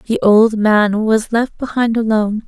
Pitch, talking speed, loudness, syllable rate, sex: 220 Hz, 170 wpm, -14 LUFS, 4.2 syllables/s, female